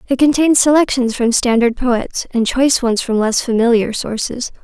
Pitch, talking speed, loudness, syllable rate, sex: 245 Hz, 170 wpm, -15 LUFS, 5.0 syllables/s, female